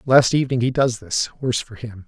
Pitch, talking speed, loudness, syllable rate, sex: 120 Hz, 230 wpm, -20 LUFS, 5.9 syllables/s, male